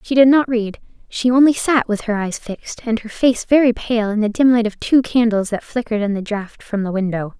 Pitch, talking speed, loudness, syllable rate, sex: 225 Hz, 250 wpm, -17 LUFS, 5.5 syllables/s, female